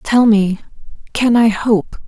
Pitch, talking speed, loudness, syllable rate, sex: 220 Hz, 145 wpm, -14 LUFS, 3.5 syllables/s, female